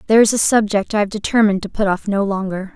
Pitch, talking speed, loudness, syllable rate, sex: 205 Hz, 260 wpm, -17 LUFS, 7.0 syllables/s, female